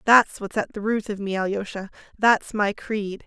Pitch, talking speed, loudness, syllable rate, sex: 210 Hz, 200 wpm, -23 LUFS, 4.7 syllables/s, female